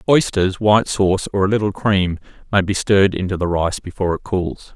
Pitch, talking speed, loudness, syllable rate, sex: 95 Hz, 200 wpm, -18 LUFS, 5.7 syllables/s, male